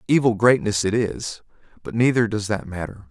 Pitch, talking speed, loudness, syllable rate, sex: 110 Hz, 155 wpm, -21 LUFS, 5.2 syllables/s, male